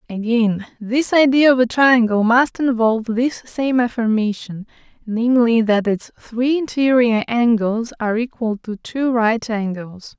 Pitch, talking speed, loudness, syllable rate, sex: 235 Hz, 135 wpm, -17 LUFS, 4.2 syllables/s, female